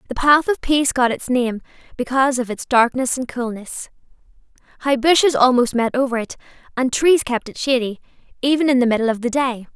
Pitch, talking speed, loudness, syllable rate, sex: 255 Hz, 190 wpm, -18 LUFS, 5.7 syllables/s, female